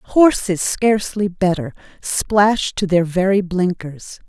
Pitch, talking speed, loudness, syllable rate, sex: 190 Hz, 110 wpm, -17 LUFS, 3.9 syllables/s, female